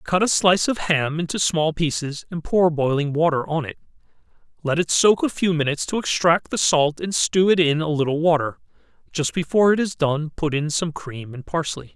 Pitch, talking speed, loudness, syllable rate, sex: 160 Hz, 210 wpm, -21 LUFS, 5.3 syllables/s, male